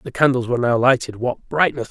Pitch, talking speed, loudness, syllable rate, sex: 125 Hz, 190 wpm, -19 LUFS, 6.1 syllables/s, male